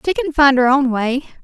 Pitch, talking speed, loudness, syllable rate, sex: 275 Hz, 250 wpm, -15 LUFS, 5.3 syllables/s, female